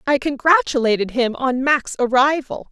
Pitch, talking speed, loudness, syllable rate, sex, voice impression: 265 Hz, 135 wpm, -18 LUFS, 4.7 syllables/s, female, feminine, adult-like, slightly relaxed, bright, soft, calm, friendly, reassuring, elegant, kind, modest